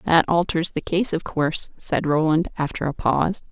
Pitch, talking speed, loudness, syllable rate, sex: 165 Hz, 190 wpm, -22 LUFS, 5.0 syllables/s, female